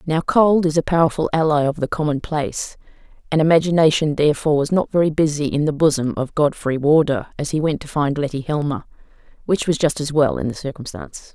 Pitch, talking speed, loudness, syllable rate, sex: 150 Hz, 195 wpm, -19 LUFS, 6.0 syllables/s, female